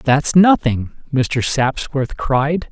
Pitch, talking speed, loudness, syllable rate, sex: 140 Hz, 110 wpm, -17 LUFS, 2.9 syllables/s, male